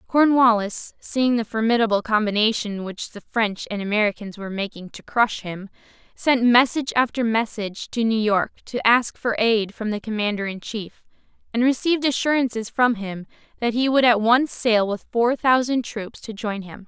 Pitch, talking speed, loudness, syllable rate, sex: 225 Hz, 175 wpm, -21 LUFS, 4.9 syllables/s, female